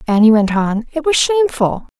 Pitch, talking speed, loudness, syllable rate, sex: 255 Hz, 180 wpm, -15 LUFS, 5.4 syllables/s, female